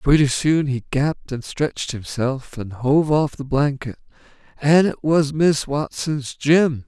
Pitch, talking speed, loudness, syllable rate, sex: 140 Hz, 155 wpm, -20 LUFS, 4.0 syllables/s, male